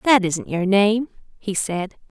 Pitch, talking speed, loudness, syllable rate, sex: 200 Hz, 165 wpm, -20 LUFS, 3.6 syllables/s, female